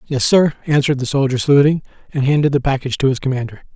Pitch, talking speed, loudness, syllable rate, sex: 140 Hz, 210 wpm, -16 LUFS, 7.2 syllables/s, male